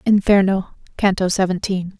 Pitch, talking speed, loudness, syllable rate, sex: 190 Hz, 90 wpm, -18 LUFS, 5.1 syllables/s, female